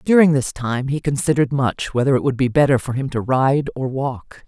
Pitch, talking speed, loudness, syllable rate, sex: 135 Hz, 230 wpm, -19 LUFS, 5.3 syllables/s, female